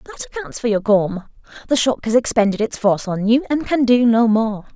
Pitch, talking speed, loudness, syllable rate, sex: 235 Hz, 225 wpm, -18 LUFS, 5.6 syllables/s, female